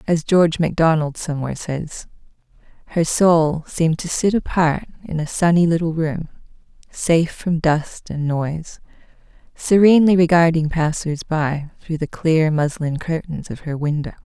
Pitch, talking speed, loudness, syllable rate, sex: 160 Hz, 140 wpm, -19 LUFS, 4.7 syllables/s, female